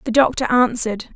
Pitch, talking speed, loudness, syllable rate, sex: 240 Hz, 155 wpm, -18 LUFS, 6.0 syllables/s, female